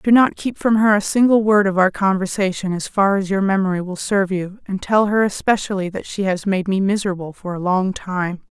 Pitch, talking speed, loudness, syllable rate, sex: 195 Hz, 235 wpm, -18 LUFS, 5.5 syllables/s, female